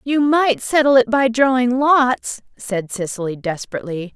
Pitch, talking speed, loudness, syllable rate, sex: 245 Hz, 145 wpm, -17 LUFS, 4.6 syllables/s, female